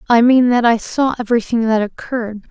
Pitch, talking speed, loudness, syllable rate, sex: 230 Hz, 190 wpm, -15 LUFS, 5.8 syllables/s, female